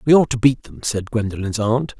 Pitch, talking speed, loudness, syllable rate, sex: 120 Hz, 240 wpm, -19 LUFS, 5.5 syllables/s, male